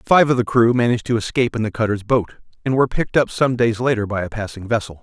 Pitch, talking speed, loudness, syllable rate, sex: 115 Hz, 265 wpm, -19 LUFS, 6.9 syllables/s, male